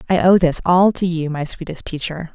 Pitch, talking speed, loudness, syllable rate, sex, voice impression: 170 Hz, 230 wpm, -18 LUFS, 5.3 syllables/s, female, very feminine, slightly old, slightly thin, slightly tensed, powerful, slightly dark, soft, clear, fluent, slightly raspy, slightly cool, very intellectual, slightly refreshing, very sincere, very calm, friendly, reassuring, unique, very elegant, sweet, lively, slightly strict, slightly intense, slightly sharp